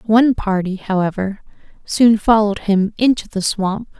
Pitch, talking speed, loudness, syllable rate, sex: 210 Hz, 135 wpm, -17 LUFS, 4.7 syllables/s, female